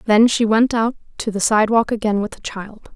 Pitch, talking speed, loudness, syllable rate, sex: 220 Hz, 245 wpm, -18 LUFS, 5.0 syllables/s, female